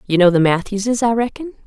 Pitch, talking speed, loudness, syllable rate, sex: 215 Hz, 215 wpm, -16 LUFS, 5.7 syllables/s, female